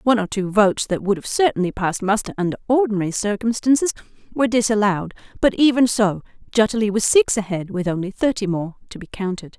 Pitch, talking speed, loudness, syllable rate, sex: 210 Hz, 180 wpm, -20 LUFS, 6.4 syllables/s, female